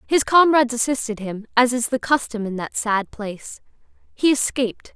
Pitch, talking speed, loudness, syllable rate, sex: 240 Hz, 170 wpm, -20 LUFS, 5.3 syllables/s, female